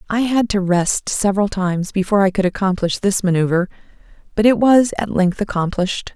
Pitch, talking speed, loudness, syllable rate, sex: 195 Hz, 175 wpm, -17 LUFS, 5.8 syllables/s, female